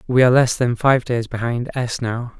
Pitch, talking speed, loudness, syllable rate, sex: 120 Hz, 225 wpm, -19 LUFS, 5.1 syllables/s, male